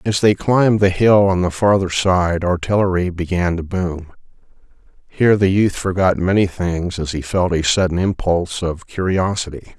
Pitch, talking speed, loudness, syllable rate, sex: 90 Hz, 165 wpm, -17 LUFS, 4.9 syllables/s, male